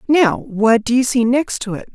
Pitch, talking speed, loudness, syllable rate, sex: 235 Hz, 245 wpm, -16 LUFS, 4.6 syllables/s, female